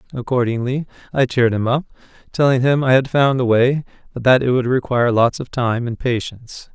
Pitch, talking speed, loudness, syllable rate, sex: 125 Hz, 195 wpm, -17 LUFS, 5.7 syllables/s, male